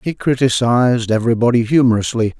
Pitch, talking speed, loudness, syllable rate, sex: 120 Hz, 100 wpm, -15 LUFS, 6.2 syllables/s, male